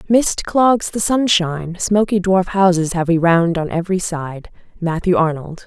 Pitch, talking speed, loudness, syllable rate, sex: 180 Hz, 160 wpm, -17 LUFS, 4.4 syllables/s, female